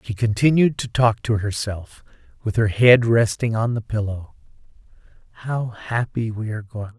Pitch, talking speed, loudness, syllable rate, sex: 115 Hz, 170 wpm, -20 LUFS, 5.0 syllables/s, male